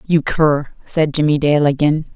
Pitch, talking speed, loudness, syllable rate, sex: 150 Hz, 165 wpm, -16 LUFS, 4.2 syllables/s, female